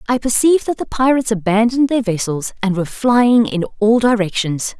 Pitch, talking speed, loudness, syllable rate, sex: 225 Hz, 175 wpm, -16 LUFS, 5.7 syllables/s, female